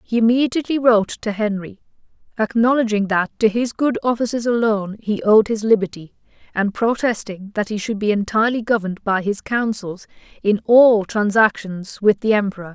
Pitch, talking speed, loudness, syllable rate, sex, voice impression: 215 Hz, 155 wpm, -18 LUFS, 5.4 syllables/s, female, feminine, slightly adult-like, slightly tensed, sincere, slightly reassuring